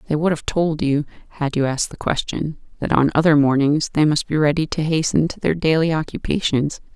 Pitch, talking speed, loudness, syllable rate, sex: 150 Hz, 205 wpm, -19 LUFS, 5.6 syllables/s, female